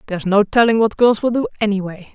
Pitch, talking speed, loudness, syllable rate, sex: 215 Hz, 225 wpm, -16 LUFS, 6.5 syllables/s, female